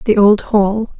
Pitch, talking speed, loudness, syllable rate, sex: 210 Hz, 180 wpm, -13 LUFS, 3.2 syllables/s, female